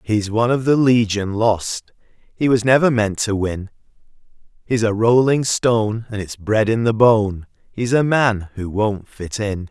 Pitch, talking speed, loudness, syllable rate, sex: 110 Hz, 185 wpm, -18 LUFS, 4.3 syllables/s, male